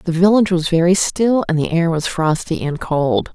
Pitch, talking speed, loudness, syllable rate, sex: 175 Hz, 215 wpm, -16 LUFS, 4.8 syllables/s, female